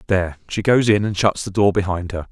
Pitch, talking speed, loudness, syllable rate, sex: 95 Hz, 260 wpm, -19 LUFS, 6.0 syllables/s, male